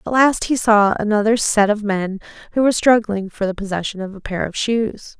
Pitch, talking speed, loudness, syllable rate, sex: 210 Hz, 220 wpm, -18 LUFS, 5.4 syllables/s, female